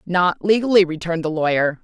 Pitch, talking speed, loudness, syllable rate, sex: 175 Hz, 165 wpm, -18 LUFS, 6.0 syllables/s, female